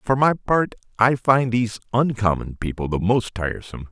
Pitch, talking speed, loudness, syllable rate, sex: 115 Hz, 170 wpm, -21 LUFS, 5.5 syllables/s, male